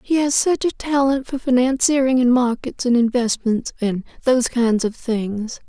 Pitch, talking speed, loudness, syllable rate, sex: 250 Hz, 170 wpm, -19 LUFS, 4.6 syllables/s, female